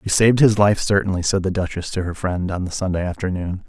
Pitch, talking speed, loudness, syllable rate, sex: 95 Hz, 245 wpm, -20 LUFS, 6.2 syllables/s, male